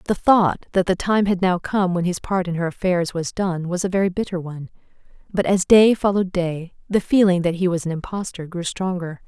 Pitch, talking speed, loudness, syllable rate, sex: 180 Hz, 225 wpm, -20 LUFS, 5.4 syllables/s, female